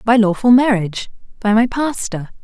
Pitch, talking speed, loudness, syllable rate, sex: 220 Hz, 150 wpm, -16 LUFS, 5.2 syllables/s, female